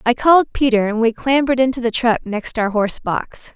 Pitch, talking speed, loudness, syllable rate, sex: 240 Hz, 220 wpm, -17 LUFS, 5.7 syllables/s, female